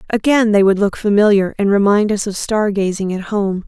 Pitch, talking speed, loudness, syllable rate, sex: 205 Hz, 195 wpm, -15 LUFS, 5.2 syllables/s, female